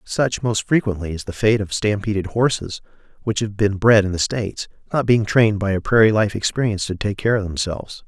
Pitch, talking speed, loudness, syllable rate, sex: 105 Hz, 215 wpm, -19 LUFS, 5.8 syllables/s, male